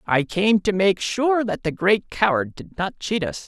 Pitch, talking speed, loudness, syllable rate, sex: 190 Hz, 225 wpm, -21 LUFS, 4.2 syllables/s, male